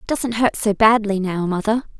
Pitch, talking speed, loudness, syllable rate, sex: 210 Hz, 210 wpm, -18 LUFS, 4.8 syllables/s, female